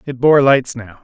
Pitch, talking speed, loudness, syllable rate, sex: 125 Hz, 230 wpm, -13 LUFS, 4.5 syllables/s, male